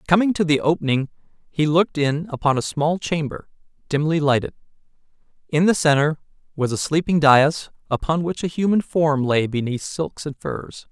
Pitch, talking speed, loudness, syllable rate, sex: 155 Hz, 165 wpm, -20 LUFS, 5.1 syllables/s, male